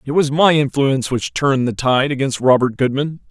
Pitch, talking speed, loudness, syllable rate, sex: 135 Hz, 200 wpm, -16 LUFS, 5.5 syllables/s, male